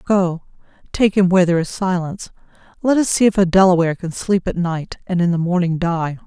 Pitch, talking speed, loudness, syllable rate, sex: 180 Hz, 210 wpm, -17 LUFS, 5.9 syllables/s, female